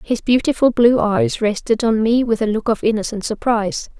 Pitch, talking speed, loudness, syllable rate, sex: 220 Hz, 195 wpm, -17 LUFS, 5.2 syllables/s, female